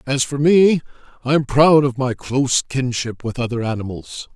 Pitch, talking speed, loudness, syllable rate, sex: 130 Hz, 180 wpm, -18 LUFS, 4.8 syllables/s, male